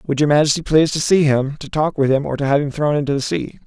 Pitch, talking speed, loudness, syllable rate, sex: 145 Hz, 310 wpm, -17 LUFS, 6.5 syllables/s, male